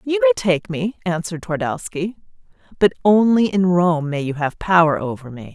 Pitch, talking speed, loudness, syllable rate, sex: 180 Hz, 175 wpm, -19 LUFS, 5.2 syllables/s, female